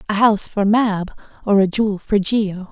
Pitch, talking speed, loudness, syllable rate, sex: 205 Hz, 200 wpm, -18 LUFS, 5.0 syllables/s, female